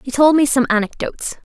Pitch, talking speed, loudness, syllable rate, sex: 265 Hz, 200 wpm, -16 LUFS, 6.0 syllables/s, female